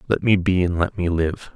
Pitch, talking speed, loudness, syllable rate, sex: 90 Hz, 270 wpm, -20 LUFS, 5.1 syllables/s, male